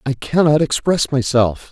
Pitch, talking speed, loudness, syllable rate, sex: 140 Hz, 140 wpm, -16 LUFS, 4.4 syllables/s, male